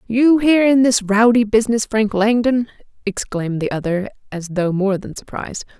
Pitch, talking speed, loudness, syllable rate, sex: 215 Hz, 165 wpm, -17 LUFS, 5.3 syllables/s, female